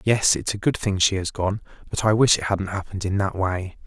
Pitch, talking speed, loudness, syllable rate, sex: 100 Hz, 265 wpm, -22 LUFS, 5.5 syllables/s, male